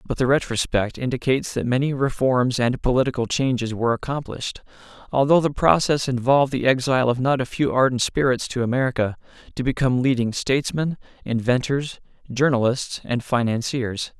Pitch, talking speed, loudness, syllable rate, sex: 130 Hz, 145 wpm, -21 LUFS, 5.7 syllables/s, male